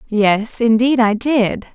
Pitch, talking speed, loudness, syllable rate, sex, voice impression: 230 Hz, 140 wpm, -15 LUFS, 3.3 syllables/s, female, feminine, adult-like, sincere, slightly calm, slightly friendly, slightly kind